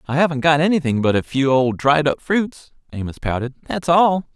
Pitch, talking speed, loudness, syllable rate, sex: 145 Hz, 205 wpm, -18 LUFS, 5.3 syllables/s, male